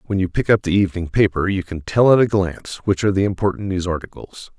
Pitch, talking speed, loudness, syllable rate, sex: 95 Hz, 250 wpm, -19 LUFS, 6.5 syllables/s, male